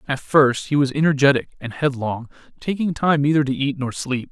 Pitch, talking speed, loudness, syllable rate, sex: 140 Hz, 195 wpm, -20 LUFS, 5.4 syllables/s, male